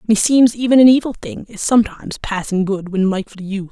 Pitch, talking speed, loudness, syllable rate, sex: 215 Hz, 195 wpm, -16 LUFS, 5.9 syllables/s, female